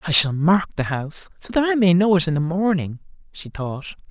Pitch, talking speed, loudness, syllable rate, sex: 170 Hz, 235 wpm, -20 LUFS, 5.4 syllables/s, male